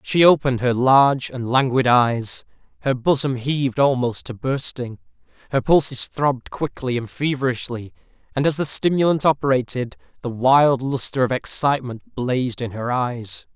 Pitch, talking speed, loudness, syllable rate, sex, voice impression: 130 Hz, 145 wpm, -20 LUFS, 4.8 syllables/s, male, masculine, very adult-like, middle-aged, very thick, tensed, powerful, bright, hard, very clear, fluent, cool, intellectual, sincere, calm, very mature, slightly friendly, reassuring, wild, slightly lively, slightly strict